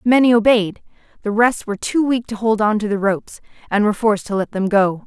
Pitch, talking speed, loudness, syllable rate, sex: 215 Hz, 235 wpm, -17 LUFS, 6.1 syllables/s, female